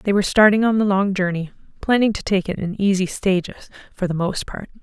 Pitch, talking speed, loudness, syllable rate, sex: 195 Hz, 225 wpm, -19 LUFS, 6.0 syllables/s, female